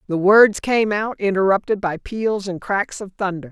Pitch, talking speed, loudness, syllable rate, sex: 200 Hz, 190 wpm, -19 LUFS, 4.5 syllables/s, female